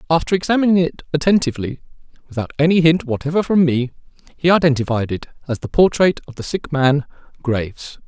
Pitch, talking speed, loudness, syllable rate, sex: 150 Hz, 155 wpm, -18 LUFS, 6.2 syllables/s, male